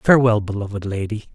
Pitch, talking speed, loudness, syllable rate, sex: 110 Hz, 135 wpm, -20 LUFS, 6.5 syllables/s, male